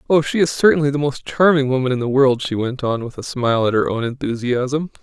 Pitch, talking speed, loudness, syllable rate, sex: 135 Hz, 250 wpm, -18 LUFS, 5.9 syllables/s, male